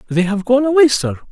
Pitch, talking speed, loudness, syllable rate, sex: 225 Hz, 230 wpm, -14 LUFS, 6.1 syllables/s, male